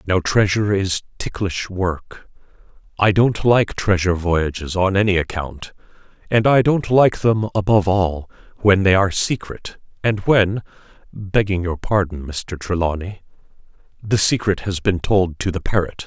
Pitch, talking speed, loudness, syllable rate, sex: 95 Hz, 145 wpm, -19 LUFS, 4.0 syllables/s, male